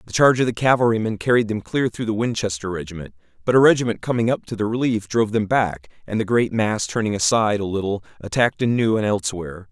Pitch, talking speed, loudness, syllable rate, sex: 110 Hz, 215 wpm, -20 LUFS, 6.6 syllables/s, male